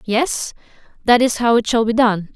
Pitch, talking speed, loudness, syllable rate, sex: 230 Hz, 205 wpm, -17 LUFS, 4.6 syllables/s, female